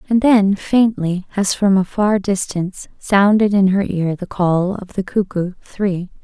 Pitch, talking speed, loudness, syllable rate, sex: 195 Hz, 165 wpm, -17 LUFS, 4.0 syllables/s, female